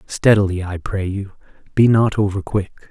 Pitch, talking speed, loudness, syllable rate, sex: 100 Hz, 165 wpm, -18 LUFS, 4.8 syllables/s, male